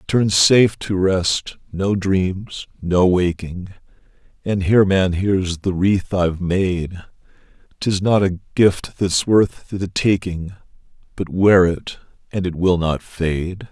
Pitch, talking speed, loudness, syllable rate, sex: 95 Hz, 140 wpm, -18 LUFS, 3.5 syllables/s, male